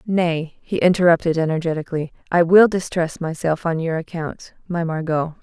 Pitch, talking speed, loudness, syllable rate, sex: 165 Hz, 145 wpm, -20 LUFS, 5.0 syllables/s, female